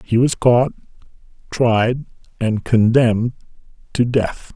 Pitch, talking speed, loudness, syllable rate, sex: 115 Hz, 105 wpm, -17 LUFS, 3.7 syllables/s, male